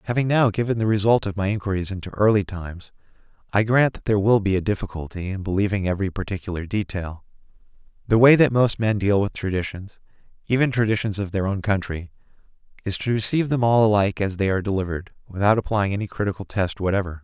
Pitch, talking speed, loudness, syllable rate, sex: 100 Hz, 190 wpm, -22 LUFS, 6.6 syllables/s, male